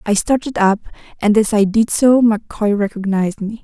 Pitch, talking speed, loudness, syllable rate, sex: 215 Hz, 180 wpm, -16 LUFS, 5.1 syllables/s, female